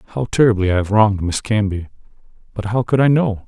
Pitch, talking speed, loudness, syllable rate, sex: 110 Hz, 205 wpm, -17 LUFS, 6.5 syllables/s, male